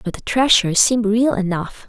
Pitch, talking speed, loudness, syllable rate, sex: 215 Hz, 190 wpm, -16 LUFS, 5.7 syllables/s, female